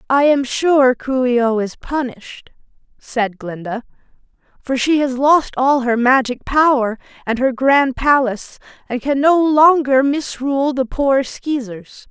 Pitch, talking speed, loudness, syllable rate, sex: 260 Hz, 150 wpm, -16 LUFS, 4.1 syllables/s, female